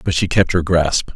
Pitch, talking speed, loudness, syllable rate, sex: 85 Hz, 260 wpm, -16 LUFS, 4.8 syllables/s, male